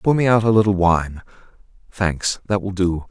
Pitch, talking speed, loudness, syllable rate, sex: 100 Hz, 195 wpm, -18 LUFS, 4.9 syllables/s, male